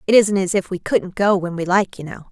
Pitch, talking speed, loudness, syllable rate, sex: 190 Hz, 310 wpm, -19 LUFS, 5.7 syllables/s, female